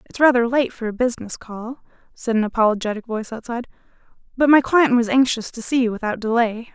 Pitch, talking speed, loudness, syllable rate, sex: 235 Hz, 195 wpm, -20 LUFS, 6.6 syllables/s, female